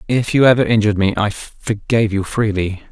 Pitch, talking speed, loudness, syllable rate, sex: 105 Hz, 185 wpm, -16 LUFS, 5.6 syllables/s, male